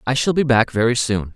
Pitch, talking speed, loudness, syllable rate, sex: 120 Hz, 265 wpm, -18 LUFS, 5.7 syllables/s, male